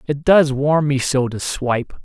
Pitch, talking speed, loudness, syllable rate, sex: 140 Hz, 205 wpm, -17 LUFS, 4.3 syllables/s, male